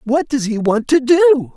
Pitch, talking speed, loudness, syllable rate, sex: 265 Hz, 230 wpm, -14 LUFS, 4.2 syllables/s, male